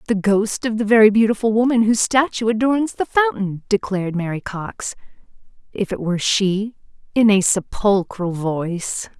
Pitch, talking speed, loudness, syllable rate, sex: 210 Hz, 150 wpm, -19 LUFS, 4.9 syllables/s, female